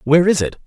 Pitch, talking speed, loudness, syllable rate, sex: 155 Hz, 270 wpm, -16 LUFS, 7.7 syllables/s, male